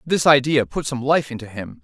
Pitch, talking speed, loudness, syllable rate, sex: 140 Hz, 230 wpm, -18 LUFS, 5.2 syllables/s, male